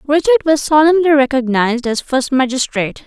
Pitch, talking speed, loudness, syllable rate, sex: 280 Hz, 135 wpm, -14 LUFS, 5.7 syllables/s, female